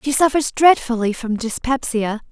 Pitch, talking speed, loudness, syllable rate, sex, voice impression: 250 Hz, 130 wpm, -18 LUFS, 4.7 syllables/s, female, very feminine, slightly young, slightly adult-like, slightly thin, very tensed, slightly powerful, bright, hard, very clear, fluent, cute, intellectual, slightly refreshing, sincere, calm, friendly, reassuring, slightly unique, slightly wild, lively, slightly strict, slightly intense